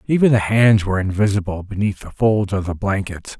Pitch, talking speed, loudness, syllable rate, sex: 100 Hz, 195 wpm, -18 LUFS, 5.5 syllables/s, male